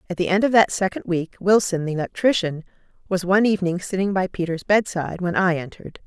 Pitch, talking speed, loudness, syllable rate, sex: 185 Hz, 200 wpm, -21 LUFS, 6.4 syllables/s, female